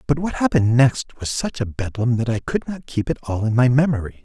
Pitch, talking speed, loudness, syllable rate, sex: 125 Hz, 255 wpm, -20 LUFS, 5.9 syllables/s, male